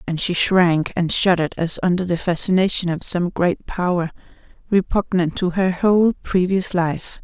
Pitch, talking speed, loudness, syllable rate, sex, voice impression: 180 Hz, 155 wpm, -19 LUFS, 4.7 syllables/s, female, very feminine, slightly middle-aged, very thin, relaxed, weak, dark, very soft, muffled, slightly halting, slightly raspy, cute, intellectual, refreshing, very sincere, very calm, friendly, reassuring, slightly unique, elegant, slightly wild, very sweet, slightly lively, kind, modest